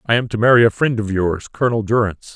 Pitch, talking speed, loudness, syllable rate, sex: 110 Hz, 255 wpm, -17 LUFS, 6.9 syllables/s, male